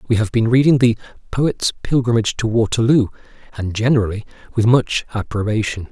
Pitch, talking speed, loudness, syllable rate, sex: 115 Hz, 140 wpm, -18 LUFS, 5.8 syllables/s, male